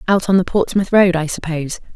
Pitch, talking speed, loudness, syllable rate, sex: 180 Hz, 215 wpm, -16 LUFS, 6.0 syllables/s, female